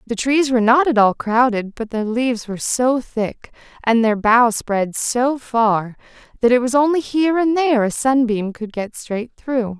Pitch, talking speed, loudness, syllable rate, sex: 240 Hz, 195 wpm, -18 LUFS, 4.5 syllables/s, female